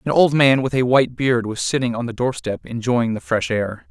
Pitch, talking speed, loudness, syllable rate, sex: 125 Hz, 245 wpm, -19 LUFS, 5.3 syllables/s, male